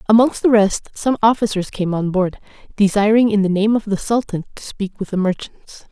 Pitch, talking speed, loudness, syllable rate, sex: 205 Hz, 205 wpm, -17 LUFS, 5.2 syllables/s, female